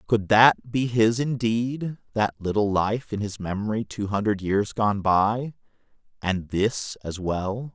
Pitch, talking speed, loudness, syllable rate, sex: 105 Hz, 145 wpm, -24 LUFS, 3.8 syllables/s, male